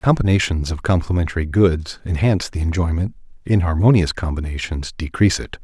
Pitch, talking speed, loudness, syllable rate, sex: 85 Hz, 115 wpm, -19 LUFS, 5.7 syllables/s, male